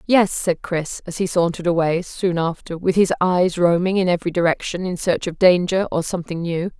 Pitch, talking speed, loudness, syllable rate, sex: 175 Hz, 205 wpm, -20 LUFS, 5.4 syllables/s, female